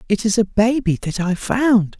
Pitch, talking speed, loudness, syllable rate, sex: 210 Hz, 210 wpm, -18 LUFS, 4.6 syllables/s, male